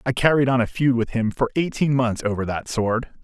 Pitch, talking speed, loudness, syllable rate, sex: 125 Hz, 240 wpm, -21 LUFS, 5.4 syllables/s, male